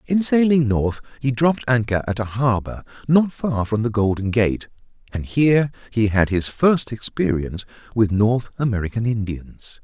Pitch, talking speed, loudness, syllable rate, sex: 115 Hz, 160 wpm, -20 LUFS, 4.7 syllables/s, male